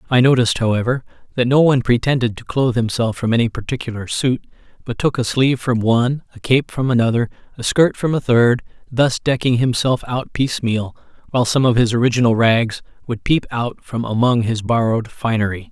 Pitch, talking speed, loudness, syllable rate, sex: 120 Hz, 185 wpm, -18 LUFS, 5.8 syllables/s, male